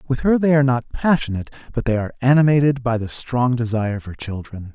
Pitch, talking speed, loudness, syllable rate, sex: 125 Hz, 200 wpm, -19 LUFS, 6.5 syllables/s, male